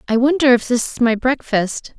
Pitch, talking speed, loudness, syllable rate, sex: 245 Hz, 210 wpm, -17 LUFS, 5.0 syllables/s, female